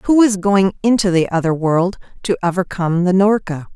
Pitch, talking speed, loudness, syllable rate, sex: 190 Hz, 175 wpm, -16 LUFS, 5.2 syllables/s, female